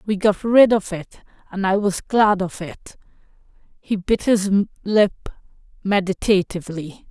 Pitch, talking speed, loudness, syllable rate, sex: 195 Hz, 135 wpm, -19 LUFS, 3.7 syllables/s, female